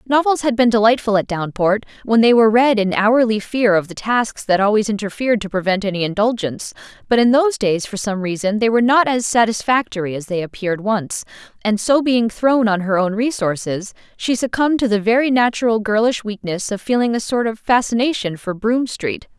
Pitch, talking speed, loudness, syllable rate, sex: 220 Hz, 200 wpm, -17 LUFS, 5.7 syllables/s, female